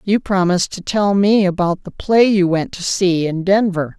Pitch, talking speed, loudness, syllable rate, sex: 185 Hz, 210 wpm, -16 LUFS, 4.6 syllables/s, female